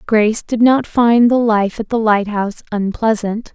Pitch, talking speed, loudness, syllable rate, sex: 220 Hz, 170 wpm, -15 LUFS, 4.5 syllables/s, female